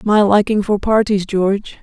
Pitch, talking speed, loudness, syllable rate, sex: 205 Hz, 165 wpm, -15 LUFS, 4.7 syllables/s, female